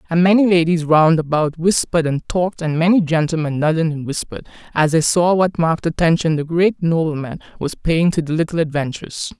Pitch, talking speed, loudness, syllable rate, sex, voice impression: 165 Hz, 185 wpm, -17 LUFS, 5.7 syllables/s, female, gender-neutral, adult-like, tensed, powerful, bright, clear, intellectual, calm, slightly friendly, reassuring, lively, slightly kind